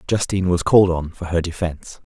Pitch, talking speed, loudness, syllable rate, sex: 90 Hz, 200 wpm, -19 LUFS, 6.3 syllables/s, male